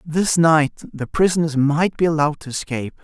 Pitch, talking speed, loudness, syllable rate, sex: 155 Hz, 180 wpm, -19 LUFS, 5.2 syllables/s, male